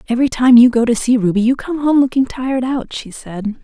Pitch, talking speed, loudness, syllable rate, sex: 245 Hz, 250 wpm, -14 LUFS, 5.9 syllables/s, female